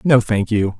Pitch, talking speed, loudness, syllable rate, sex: 110 Hz, 225 wpm, -17 LUFS, 4.4 syllables/s, male